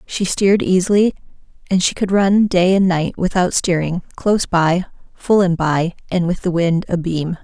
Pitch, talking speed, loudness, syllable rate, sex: 180 Hz, 180 wpm, -17 LUFS, 4.7 syllables/s, female